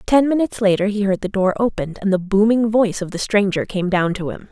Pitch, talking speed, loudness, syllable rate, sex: 205 Hz, 255 wpm, -18 LUFS, 6.2 syllables/s, female